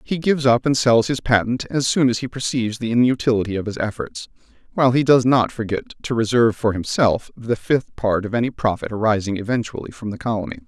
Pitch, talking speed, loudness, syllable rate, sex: 115 Hz, 210 wpm, -20 LUFS, 6.1 syllables/s, male